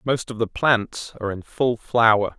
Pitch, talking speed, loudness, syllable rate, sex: 115 Hz, 200 wpm, -21 LUFS, 4.4 syllables/s, male